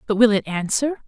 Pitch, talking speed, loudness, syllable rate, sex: 220 Hz, 225 wpm, -20 LUFS, 5.4 syllables/s, female